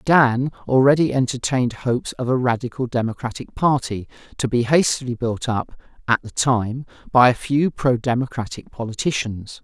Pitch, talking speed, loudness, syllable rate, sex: 125 Hz, 145 wpm, -20 LUFS, 5.0 syllables/s, male